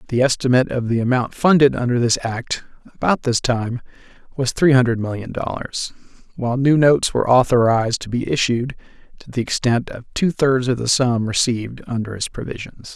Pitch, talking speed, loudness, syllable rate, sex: 125 Hz, 175 wpm, -19 LUFS, 5.6 syllables/s, male